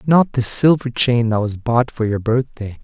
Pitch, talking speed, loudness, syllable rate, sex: 125 Hz, 210 wpm, -17 LUFS, 4.5 syllables/s, male